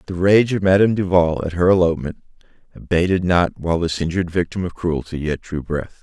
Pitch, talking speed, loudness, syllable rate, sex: 90 Hz, 190 wpm, -19 LUFS, 6.0 syllables/s, male